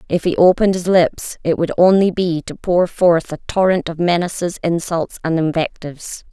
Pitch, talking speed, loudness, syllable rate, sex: 170 Hz, 180 wpm, -17 LUFS, 4.9 syllables/s, female